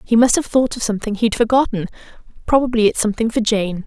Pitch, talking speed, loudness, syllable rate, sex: 225 Hz, 200 wpm, -17 LUFS, 6.6 syllables/s, female